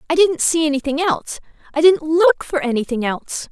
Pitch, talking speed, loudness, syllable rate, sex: 305 Hz, 170 wpm, -17 LUFS, 5.7 syllables/s, female